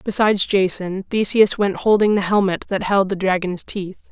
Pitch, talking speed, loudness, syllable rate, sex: 195 Hz, 175 wpm, -18 LUFS, 4.9 syllables/s, female